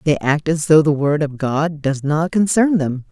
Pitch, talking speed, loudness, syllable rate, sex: 155 Hz, 230 wpm, -17 LUFS, 4.4 syllables/s, female